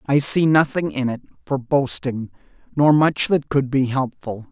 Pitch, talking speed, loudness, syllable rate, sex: 135 Hz, 175 wpm, -19 LUFS, 4.3 syllables/s, male